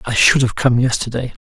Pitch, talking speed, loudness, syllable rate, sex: 125 Hz, 210 wpm, -15 LUFS, 5.6 syllables/s, male